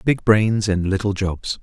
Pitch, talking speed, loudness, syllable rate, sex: 100 Hz, 185 wpm, -19 LUFS, 3.9 syllables/s, male